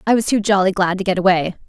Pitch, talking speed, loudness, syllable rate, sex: 190 Hz, 285 wpm, -17 LUFS, 6.9 syllables/s, female